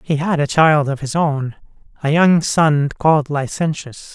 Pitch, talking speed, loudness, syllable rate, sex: 150 Hz, 175 wpm, -16 LUFS, 4.1 syllables/s, male